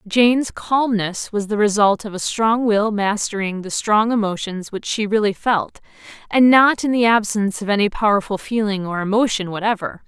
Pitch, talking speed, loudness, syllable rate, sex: 210 Hz, 175 wpm, -18 LUFS, 5.0 syllables/s, female